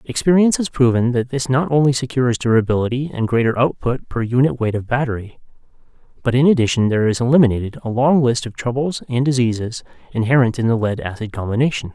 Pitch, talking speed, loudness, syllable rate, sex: 125 Hz, 180 wpm, -18 LUFS, 6.4 syllables/s, male